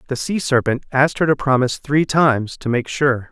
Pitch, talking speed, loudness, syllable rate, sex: 135 Hz, 215 wpm, -18 LUFS, 5.6 syllables/s, male